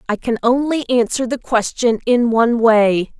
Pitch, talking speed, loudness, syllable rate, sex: 235 Hz, 170 wpm, -16 LUFS, 4.5 syllables/s, female